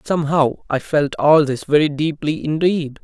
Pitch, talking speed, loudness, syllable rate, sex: 150 Hz, 160 wpm, -18 LUFS, 4.6 syllables/s, male